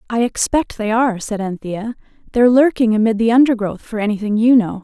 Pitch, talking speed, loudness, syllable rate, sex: 225 Hz, 185 wpm, -16 LUFS, 5.8 syllables/s, female